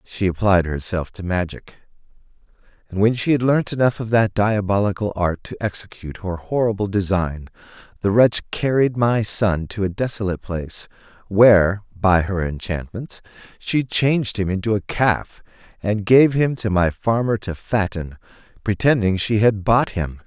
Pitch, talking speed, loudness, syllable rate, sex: 100 Hz, 155 wpm, -20 LUFS, 4.7 syllables/s, male